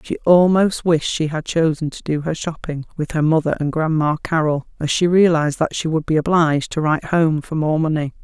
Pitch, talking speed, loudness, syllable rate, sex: 160 Hz, 220 wpm, -18 LUFS, 5.4 syllables/s, female